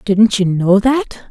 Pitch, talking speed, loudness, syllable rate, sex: 215 Hz, 185 wpm, -13 LUFS, 3.3 syllables/s, female